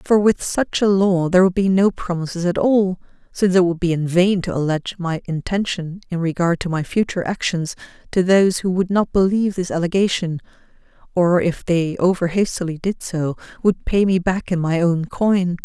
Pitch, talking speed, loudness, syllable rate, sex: 180 Hz, 195 wpm, -19 LUFS, 5.3 syllables/s, female